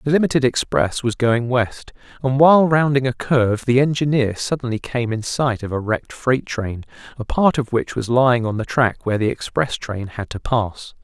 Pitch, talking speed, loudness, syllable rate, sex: 125 Hz, 205 wpm, -19 LUFS, 5.1 syllables/s, male